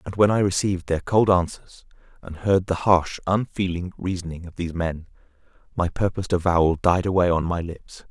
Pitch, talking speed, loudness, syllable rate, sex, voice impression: 90 Hz, 180 wpm, -22 LUFS, 5.4 syllables/s, male, very masculine, very adult-like, thick, tensed, slightly powerful, slightly bright, soft, slightly muffled, fluent, slightly raspy, cool, very intellectual, refreshing, slightly sincere, very calm, mature, very friendly, reassuring, very unique, slightly elegant, wild, sweet, lively, kind, slightly modest